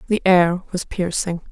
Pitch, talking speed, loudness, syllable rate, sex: 180 Hz, 160 wpm, -19 LUFS, 4.4 syllables/s, female